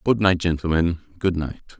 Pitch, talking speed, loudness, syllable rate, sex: 85 Hz, 165 wpm, -22 LUFS, 5.3 syllables/s, male